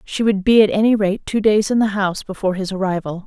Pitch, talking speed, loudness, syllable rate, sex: 200 Hz, 260 wpm, -17 LUFS, 6.4 syllables/s, female